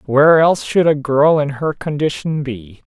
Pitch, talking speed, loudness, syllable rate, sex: 145 Hz, 185 wpm, -15 LUFS, 4.6 syllables/s, male